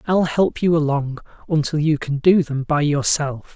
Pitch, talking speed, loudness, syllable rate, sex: 150 Hz, 185 wpm, -19 LUFS, 4.5 syllables/s, male